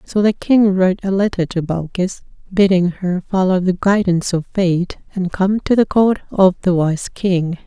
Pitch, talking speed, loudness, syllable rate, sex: 185 Hz, 190 wpm, -16 LUFS, 4.7 syllables/s, female